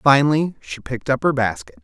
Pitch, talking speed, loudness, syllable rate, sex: 130 Hz, 195 wpm, -20 LUFS, 5.9 syllables/s, male